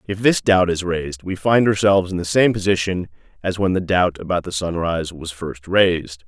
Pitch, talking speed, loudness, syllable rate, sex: 90 Hz, 210 wpm, -19 LUFS, 5.4 syllables/s, male